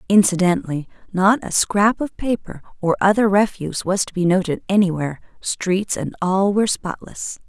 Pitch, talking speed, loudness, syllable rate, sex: 190 Hz, 145 wpm, -19 LUFS, 5.1 syllables/s, female